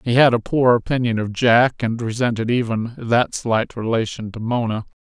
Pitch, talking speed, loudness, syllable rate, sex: 115 Hz, 180 wpm, -19 LUFS, 4.9 syllables/s, male